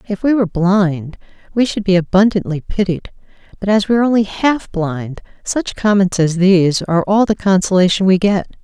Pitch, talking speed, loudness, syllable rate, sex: 195 Hz, 180 wpm, -15 LUFS, 5.3 syllables/s, female